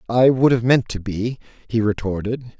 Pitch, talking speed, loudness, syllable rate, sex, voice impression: 115 Hz, 185 wpm, -20 LUFS, 4.8 syllables/s, male, very masculine, very adult-like, middle-aged, very thick, tensed, very powerful, bright, soft, slightly muffled, fluent, cool, intellectual, slightly refreshing, very sincere, very calm, mature, friendly, reassuring, slightly unique, elegant, slightly wild, slightly sweet, very lively, kind, slightly modest